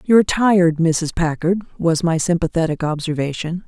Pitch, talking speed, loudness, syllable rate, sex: 170 Hz, 145 wpm, -18 LUFS, 5.4 syllables/s, female